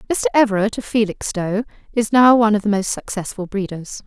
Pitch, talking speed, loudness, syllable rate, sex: 210 Hz, 175 wpm, -18 LUFS, 6.0 syllables/s, female